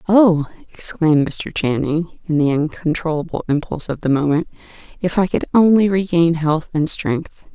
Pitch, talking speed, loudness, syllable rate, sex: 165 Hz, 150 wpm, -18 LUFS, 4.8 syllables/s, female